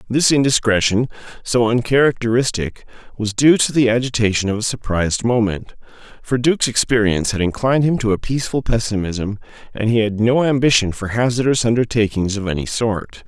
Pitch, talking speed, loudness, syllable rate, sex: 115 Hz, 155 wpm, -17 LUFS, 5.7 syllables/s, male